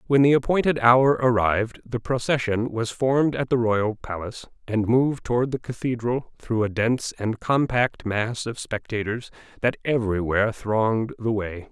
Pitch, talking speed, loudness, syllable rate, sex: 115 Hz, 165 wpm, -23 LUFS, 4.9 syllables/s, male